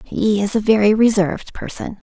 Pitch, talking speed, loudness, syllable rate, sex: 210 Hz, 170 wpm, -17 LUFS, 5.2 syllables/s, female